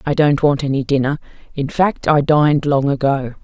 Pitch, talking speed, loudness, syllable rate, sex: 140 Hz, 190 wpm, -16 LUFS, 5.2 syllables/s, female